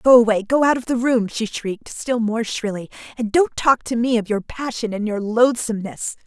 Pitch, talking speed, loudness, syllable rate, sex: 230 Hz, 220 wpm, -20 LUFS, 5.2 syllables/s, female